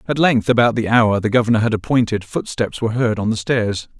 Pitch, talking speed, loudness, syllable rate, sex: 115 Hz, 225 wpm, -17 LUFS, 5.8 syllables/s, male